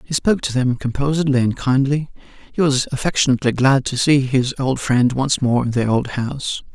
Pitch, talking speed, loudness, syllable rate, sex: 130 Hz, 195 wpm, -18 LUFS, 5.5 syllables/s, male